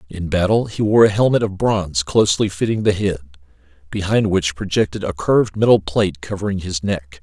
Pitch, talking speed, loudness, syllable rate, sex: 95 Hz, 185 wpm, -18 LUFS, 5.7 syllables/s, male